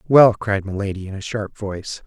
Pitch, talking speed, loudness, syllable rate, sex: 105 Hz, 205 wpm, -20 LUFS, 5.3 syllables/s, male